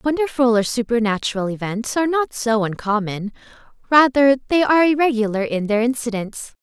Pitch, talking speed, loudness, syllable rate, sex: 240 Hz, 135 wpm, -19 LUFS, 5.6 syllables/s, female